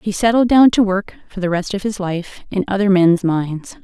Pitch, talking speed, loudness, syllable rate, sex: 200 Hz, 235 wpm, -16 LUFS, 5.2 syllables/s, female